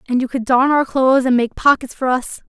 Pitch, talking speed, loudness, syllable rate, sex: 260 Hz, 265 wpm, -16 LUFS, 5.8 syllables/s, female